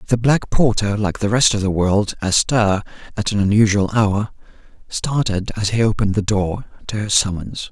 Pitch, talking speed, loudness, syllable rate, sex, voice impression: 105 Hz, 180 wpm, -18 LUFS, 4.9 syllables/s, male, masculine, adult-like, thick, slightly tensed, slightly powerful, soft, slightly raspy, intellectual, calm, slightly mature, slightly friendly, reassuring, wild, kind